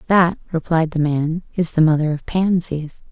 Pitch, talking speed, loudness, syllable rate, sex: 165 Hz, 175 wpm, -19 LUFS, 4.6 syllables/s, female